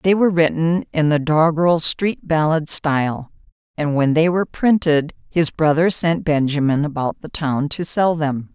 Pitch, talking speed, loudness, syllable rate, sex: 155 Hz, 170 wpm, -18 LUFS, 4.6 syllables/s, female